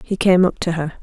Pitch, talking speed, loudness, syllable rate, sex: 175 Hz, 295 wpm, -17 LUFS, 5.9 syllables/s, female